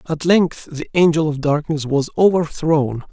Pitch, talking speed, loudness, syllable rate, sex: 155 Hz, 155 wpm, -17 LUFS, 4.3 syllables/s, male